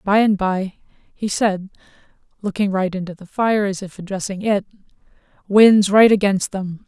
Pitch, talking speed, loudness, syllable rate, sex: 195 Hz, 155 wpm, -18 LUFS, 2.6 syllables/s, female